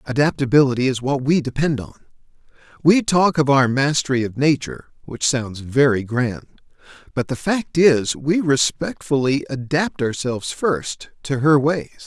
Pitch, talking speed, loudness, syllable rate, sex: 140 Hz, 145 wpm, -19 LUFS, 4.6 syllables/s, male